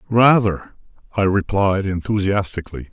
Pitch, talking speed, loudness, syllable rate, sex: 100 Hz, 80 wpm, -19 LUFS, 4.9 syllables/s, male